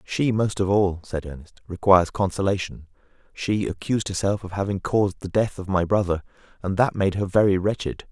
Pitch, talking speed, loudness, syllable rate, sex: 95 Hz, 185 wpm, -23 LUFS, 5.6 syllables/s, male